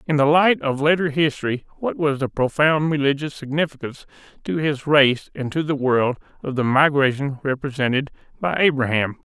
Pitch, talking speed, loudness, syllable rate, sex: 140 Hz, 160 wpm, -20 LUFS, 5.3 syllables/s, male